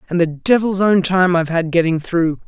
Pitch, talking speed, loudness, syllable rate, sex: 175 Hz, 220 wpm, -16 LUFS, 5.4 syllables/s, female